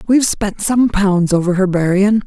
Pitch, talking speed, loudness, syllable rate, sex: 200 Hz, 185 wpm, -14 LUFS, 4.8 syllables/s, female